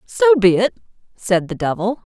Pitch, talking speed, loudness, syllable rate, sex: 215 Hz, 170 wpm, -17 LUFS, 4.9 syllables/s, female